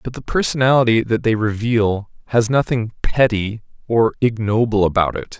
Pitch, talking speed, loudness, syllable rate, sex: 110 Hz, 145 wpm, -18 LUFS, 4.9 syllables/s, male